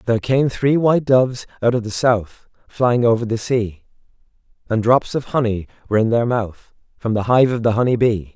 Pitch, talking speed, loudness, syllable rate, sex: 115 Hz, 200 wpm, -18 LUFS, 5.3 syllables/s, male